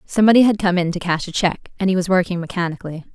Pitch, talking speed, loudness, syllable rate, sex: 185 Hz, 250 wpm, -18 LUFS, 7.5 syllables/s, female